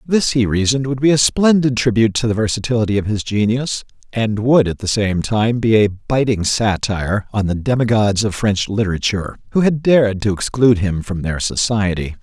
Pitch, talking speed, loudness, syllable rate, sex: 110 Hz, 190 wpm, -17 LUFS, 5.4 syllables/s, male